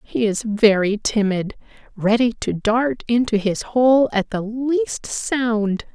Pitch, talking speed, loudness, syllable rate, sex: 225 Hz, 140 wpm, -19 LUFS, 3.3 syllables/s, female